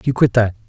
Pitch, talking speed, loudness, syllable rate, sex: 115 Hz, 265 wpm, -16 LUFS, 6.3 syllables/s, male